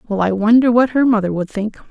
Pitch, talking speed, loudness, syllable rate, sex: 220 Hz, 250 wpm, -15 LUFS, 6.1 syllables/s, female